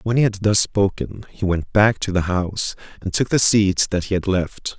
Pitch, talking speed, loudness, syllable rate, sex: 100 Hz, 240 wpm, -19 LUFS, 4.8 syllables/s, male